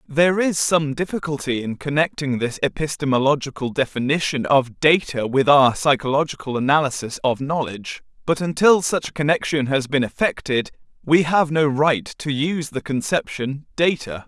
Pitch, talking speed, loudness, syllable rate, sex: 145 Hz, 145 wpm, -20 LUFS, 5.1 syllables/s, male